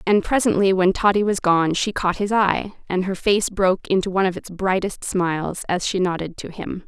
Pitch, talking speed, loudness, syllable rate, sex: 190 Hz, 220 wpm, -21 LUFS, 5.3 syllables/s, female